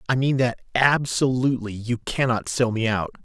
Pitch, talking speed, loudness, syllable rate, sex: 125 Hz, 220 wpm, -22 LUFS, 4.6 syllables/s, male